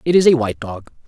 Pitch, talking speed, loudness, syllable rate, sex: 130 Hz, 280 wpm, -16 LUFS, 7.1 syllables/s, male